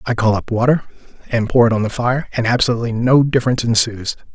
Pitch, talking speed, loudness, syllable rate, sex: 120 Hz, 205 wpm, -16 LUFS, 6.7 syllables/s, male